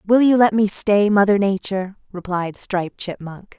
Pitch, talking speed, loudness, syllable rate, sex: 200 Hz, 165 wpm, -18 LUFS, 4.8 syllables/s, female